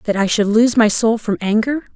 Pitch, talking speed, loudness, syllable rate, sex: 220 Hz, 245 wpm, -16 LUFS, 5.4 syllables/s, female